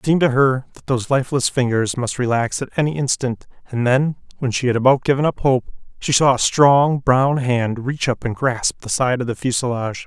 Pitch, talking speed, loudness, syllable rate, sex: 130 Hz, 220 wpm, -18 LUFS, 5.6 syllables/s, male